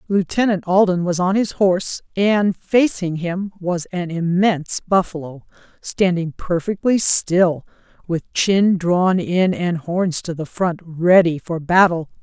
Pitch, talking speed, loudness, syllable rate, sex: 180 Hz, 135 wpm, -18 LUFS, 3.9 syllables/s, female